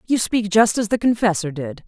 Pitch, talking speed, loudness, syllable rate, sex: 205 Hz, 225 wpm, -19 LUFS, 5.2 syllables/s, female